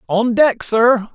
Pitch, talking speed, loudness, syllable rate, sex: 230 Hz, 155 wpm, -15 LUFS, 3.1 syllables/s, male